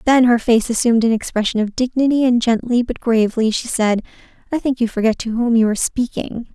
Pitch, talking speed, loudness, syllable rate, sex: 235 Hz, 210 wpm, -17 LUFS, 6.0 syllables/s, female